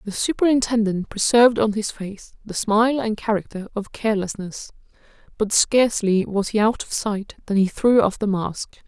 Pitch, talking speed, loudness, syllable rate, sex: 210 Hz, 170 wpm, -21 LUFS, 5.1 syllables/s, female